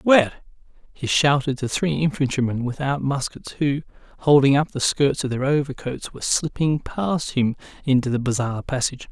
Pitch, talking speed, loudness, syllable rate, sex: 135 Hz, 160 wpm, -22 LUFS, 5.2 syllables/s, male